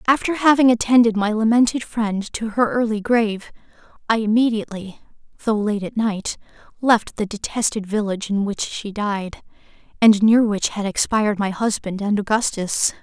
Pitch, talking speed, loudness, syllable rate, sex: 215 Hz, 150 wpm, -19 LUFS, 4.9 syllables/s, female